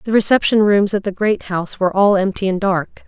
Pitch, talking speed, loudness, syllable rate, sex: 200 Hz, 235 wpm, -16 LUFS, 5.8 syllables/s, female